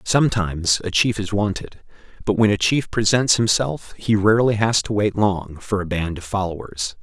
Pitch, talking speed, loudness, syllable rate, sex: 105 Hz, 190 wpm, -20 LUFS, 5.0 syllables/s, male